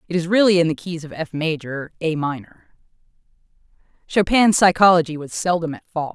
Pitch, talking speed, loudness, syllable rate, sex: 165 Hz, 155 wpm, -19 LUFS, 5.4 syllables/s, female